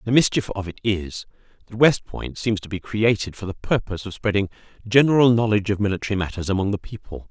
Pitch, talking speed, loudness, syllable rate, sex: 105 Hz, 215 wpm, -22 LUFS, 6.5 syllables/s, male